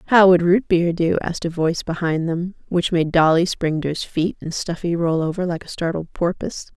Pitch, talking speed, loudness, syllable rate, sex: 170 Hz, 220 wpm, -20 LUFS, 5.5 syllables/s, female